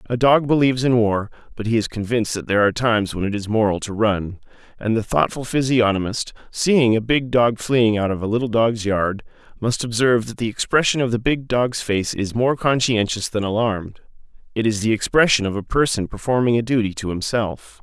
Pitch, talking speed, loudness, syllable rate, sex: 115 Hz, 205 wpm, -20 LUFS, 5.6 syllables/s, male